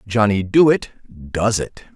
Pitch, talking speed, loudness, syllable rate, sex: 105 Hz, 125 wpm, -17 LUFS, 3.3 syllables/s, male